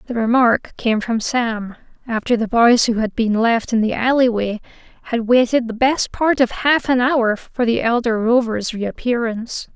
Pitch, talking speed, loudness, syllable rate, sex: 235 Hz, 180 wpm, -18 LUFS, 4.5 syllables/s, female